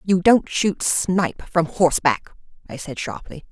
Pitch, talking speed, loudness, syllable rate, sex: 170 Hz, 155 wpm, -20 LUFS, 4.6 syllables/s, female